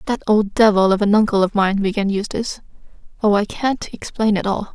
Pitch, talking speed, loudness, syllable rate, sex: 205 Hz, 190 wpm, -18 LUFS, 5.6 syllables/s, female